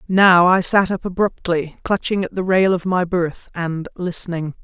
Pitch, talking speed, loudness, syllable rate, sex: 180 Hz, 180 wpm, -18 LUFS, 4.4 syllables/s, female